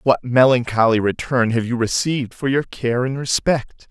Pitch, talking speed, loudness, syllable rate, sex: 125 Hz, 170 wpm, -18 LUFS, 4.8 syllables/s, male